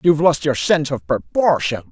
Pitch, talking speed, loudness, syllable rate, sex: 140 Hz, 190 wpm, -18 LUFS, 5.7 syllables/s, male